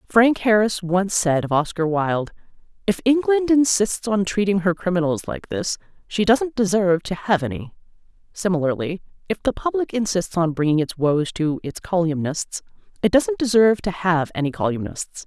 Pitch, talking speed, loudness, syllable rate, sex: 185 Hz, 160 wpm, -21 LUFS, 5.0 syllables/s, female